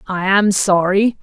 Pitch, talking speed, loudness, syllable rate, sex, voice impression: 195 Hz, 145 wpm, -15 LUFS, 3.9 syllables/s, female, feminine, adult-like, slightly powerful, intellectual, strict